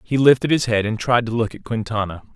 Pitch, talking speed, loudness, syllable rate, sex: 115 Hz, 255 wpm, -19 LUFS, 6.1 syllables/s, male